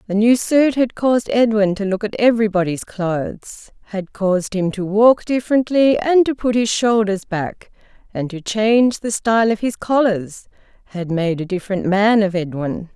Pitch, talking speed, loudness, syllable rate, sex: 210 Hz, 175 wpm, -17 LUFS, 4.8 syllables/s, female